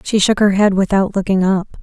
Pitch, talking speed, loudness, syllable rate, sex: 195 Hz, 230 wpm, -15 LUFS, 5.3 syllables/s, female